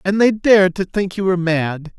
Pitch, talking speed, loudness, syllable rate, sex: 185 Hz, 240 wpm, -16 LUFS, 5.4 syllables/s, male